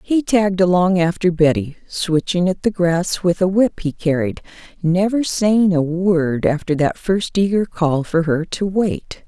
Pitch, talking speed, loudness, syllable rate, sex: 180 Hz, 175 wpm, -18 LUFS, 4.2 syllables/s, female